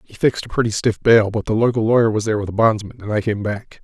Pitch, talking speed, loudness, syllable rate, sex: 110 Hz, 295 wpm, -18 LUFS, 6.8 syllables/s, male